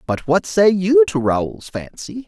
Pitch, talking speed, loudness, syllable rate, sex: 165 Hz, 185 wpm, -16 LUFS, 3.8 syllables/s, male